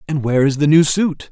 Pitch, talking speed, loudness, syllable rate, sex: 150 Hz, 275 wpm, -15 LUFS, 6.1 syllables/s, male